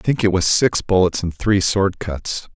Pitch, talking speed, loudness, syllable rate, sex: 95 Hz, 235 wpm, -18 LUFS, 4.5 syllables/s, male